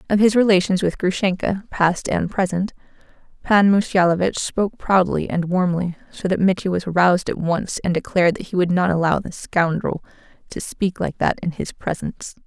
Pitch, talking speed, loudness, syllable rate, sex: 185 Hz, 180 wpm, -20 LUFS, 5.2 syllables/s, female